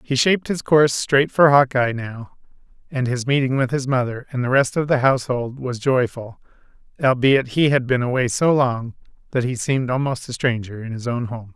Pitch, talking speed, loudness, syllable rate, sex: 130 Hz, 195 wpm, -20 LUFS, 5.2 syllables/s, male